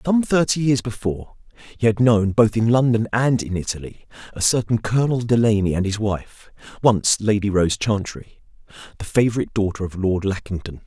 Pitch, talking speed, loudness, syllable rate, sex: 110 Hz, 165 wpm, -20 LUFS, 5.3 syllables/s, male